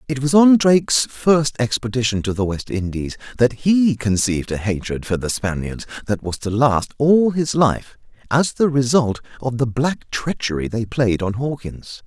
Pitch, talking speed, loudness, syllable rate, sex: 125 Hz, 180 wpm, -19 LUFS, 4.5 syllables/s, male